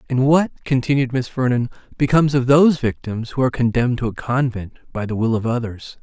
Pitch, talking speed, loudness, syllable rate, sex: 125 Hz, 200 wpm, -19 LUFS, 6.1 syllables/s, male